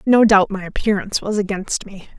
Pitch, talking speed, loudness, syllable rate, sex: 200 Hz, 190 wpm, -18 LUFS, 5.6 syllables/s, female